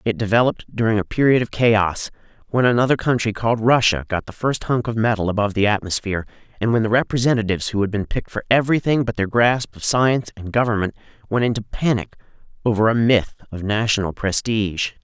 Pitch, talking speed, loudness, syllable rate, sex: 110 Hz, 190 wpm, -19 LUFS, 6.3 syllables/s, male